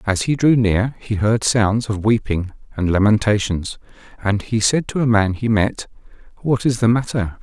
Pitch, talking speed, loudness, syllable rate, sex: 110 Hz, 185 wpm, -18 LUFS, 4.6 syllables/s, male